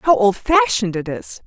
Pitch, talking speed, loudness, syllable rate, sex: 235 Hz, 165 wpm, -17 LUFS, 4.9 syllables/s, female